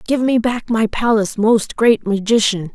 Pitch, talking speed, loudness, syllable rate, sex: 220 Hz, 175 wpm, -16 LUFS, 4.6 syllables/s, female